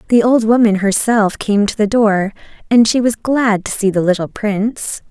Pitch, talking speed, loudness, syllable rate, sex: 215 Hz, 200 wpm, -14 LUFS, 4.7 syllables/s, female